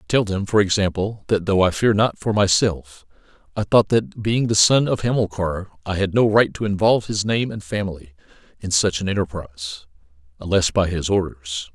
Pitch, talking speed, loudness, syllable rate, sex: 95 Hz, 190 wpm, -20 LUFS, 5.4 syllables/s, male